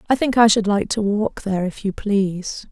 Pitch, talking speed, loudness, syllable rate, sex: 210 Hz, 245 wpm, -19 LUFS, 5.2 syllables/s, female